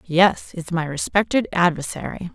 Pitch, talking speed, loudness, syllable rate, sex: 175 Hz, 130 wpm, -21 LUFS, 4.6 syllables/s, female